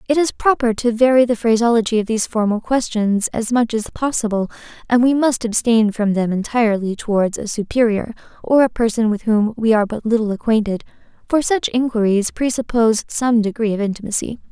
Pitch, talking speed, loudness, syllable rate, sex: 225 Hz, 180 wpm, -18 LUFS, 5.7 syllables/s, female